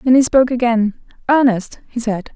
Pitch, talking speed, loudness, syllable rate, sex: 235 Hz, 180 wpm, -16 LUFS, 5.4 syllables/s, female